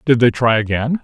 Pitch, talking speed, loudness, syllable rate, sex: 125 Hz, 235 wpm, -15 LUFS, 5.4 syllables/s, male